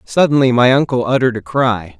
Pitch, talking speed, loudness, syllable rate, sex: 125 Hz, 180 wpm, -14 LUFS, 5.8 syllables/s, male